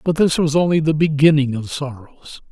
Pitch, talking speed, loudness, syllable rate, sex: 150 Hz, 190 wpm, -17 LUFS, 5.1 syllables/s, male